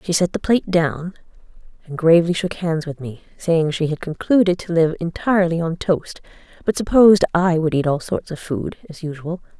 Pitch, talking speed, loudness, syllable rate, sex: 170 Hz, 195 wpm, -19 LUFS, 5.4 syllables/s, female